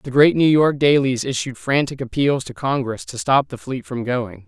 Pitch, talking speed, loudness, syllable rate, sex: 130 Hz, 215 wpm, -19 LUFS, 4.7 syllables/s, male